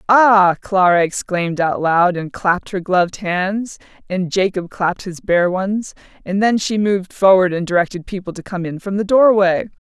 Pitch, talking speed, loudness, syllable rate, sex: 190 Hz, 180 wpm, -17 LUFS, 4.8 syllables/s, female